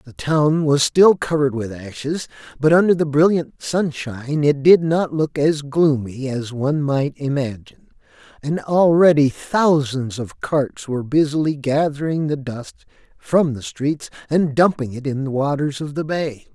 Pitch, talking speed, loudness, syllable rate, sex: 145 Hz, 160 wpm, -19 LUFS, 4.4 syllables/s, male